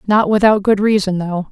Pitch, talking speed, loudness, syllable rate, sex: 200 Hz, 200 wpm, -14 LUFS, 5.2 syllables/s, female